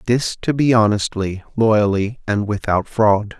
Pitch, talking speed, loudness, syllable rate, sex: 105 Hz, 140 wpm, -18 LUFS, 4.0 syllables/s, male